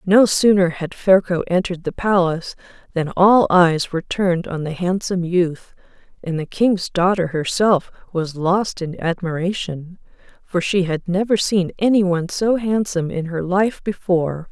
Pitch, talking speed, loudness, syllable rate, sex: 180 Hz, 155 wpm, -19 LUFS, 4.6 syllables/s, female